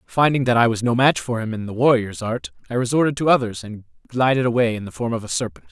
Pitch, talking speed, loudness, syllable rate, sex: 120 Hz, 260 wpm, -20 LUFS, 6.4 syllables/s, male